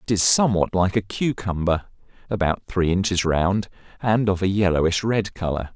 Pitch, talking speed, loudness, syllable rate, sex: 95 Hz, 165 wpm, -22 LUFS, 5.1 syllables/s, male